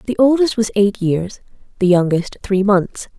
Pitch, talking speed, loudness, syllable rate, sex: 205 Hz, 170 wpm, -16 LUFS, 4.3 syllables/s, female